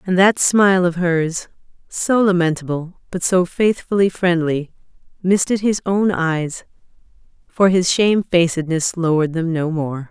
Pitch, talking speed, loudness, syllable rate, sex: 175 Hz, 130 wpm, -17 LUFS, 4.4 syllables/s, female